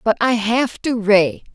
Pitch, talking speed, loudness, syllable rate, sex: 220 Hz, 195 wpm, -17 LUFS, 3.8 syllables/s, female